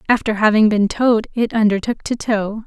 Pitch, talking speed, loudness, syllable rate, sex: 215 Hz, 180 wpm, -17 LUFS, 5.4 syllables/s, female